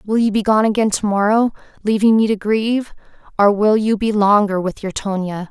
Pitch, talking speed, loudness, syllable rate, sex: 210 Hz, 205 wpm, -17 LUFS, 5.4 syllables/s, female